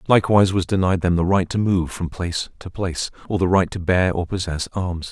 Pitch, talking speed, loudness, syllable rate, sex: 90 Hz, 235 wpm, -21 LUFS, 5.8 syllables/s, male